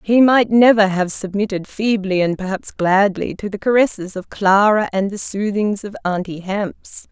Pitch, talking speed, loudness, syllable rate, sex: 200 Hz, 170 wpm, -17 LUFS, 4.7 syllables/s, female